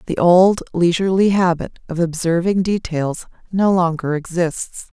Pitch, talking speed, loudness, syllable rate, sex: 175 Hz, 120 wpm, -17 LUFS, 4.4 syllables/s, female